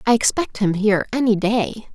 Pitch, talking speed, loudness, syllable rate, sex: 215 Hz, 185 wpm, -19 LUFS, 5.2 syllables/s, female